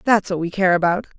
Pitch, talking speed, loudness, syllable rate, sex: 190 Hz, 255 wpm, -19 LUFS, 6.3 syllables/s, female